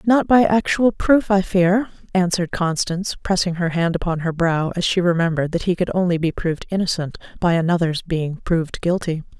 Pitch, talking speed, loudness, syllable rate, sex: 175 Hz, 185 wpm, -19 LUFS, 5.5 syllables/s, female